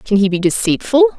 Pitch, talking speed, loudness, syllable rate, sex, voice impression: 225 Hz, 205 wpm, -15 LUFS, 5.5 syllables/s, female, very feminine, young, very thin, slightly tensed, slightly weak, very bright, slightly soft, very clear, very fluent, slightly raspy, very cute, intellectual, very refreshing, sincere, calm, very friendly, very reassuring, very unique, very elegant, slightly wild, very sweet, very lively, kind, slightly intense, slightly sharp, light